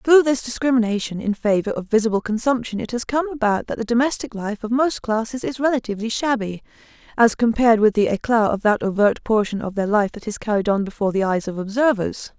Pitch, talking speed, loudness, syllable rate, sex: 225 Hz, 210 wpm, -20 LUFS, 6.1 syllables/s, female